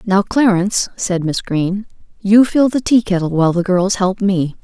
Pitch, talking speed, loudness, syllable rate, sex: 195 Hz, 180 wpm, -15 LUFS, 4.6 syllables/s, female